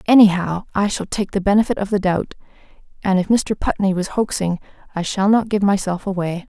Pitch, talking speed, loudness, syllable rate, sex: 195 Hz, 190 wpm, -19 LUFS, 5.5 syllables/s, female